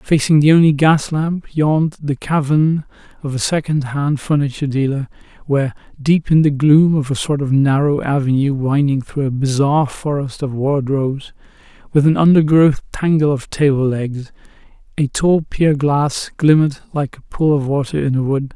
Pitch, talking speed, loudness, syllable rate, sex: 145 Hz, 165 wpm, -16 LUFS, 4.9 syllables/s, male